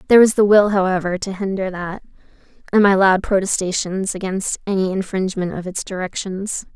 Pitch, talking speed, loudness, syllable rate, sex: 190 Hz, 160 wpm, -18 LUFS, 5.6 syllables/s, female